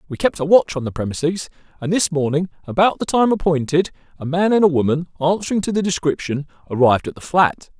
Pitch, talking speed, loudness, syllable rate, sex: 160 Hz, 210 wpm, -19 LUFS, 6.1 syllables/s, male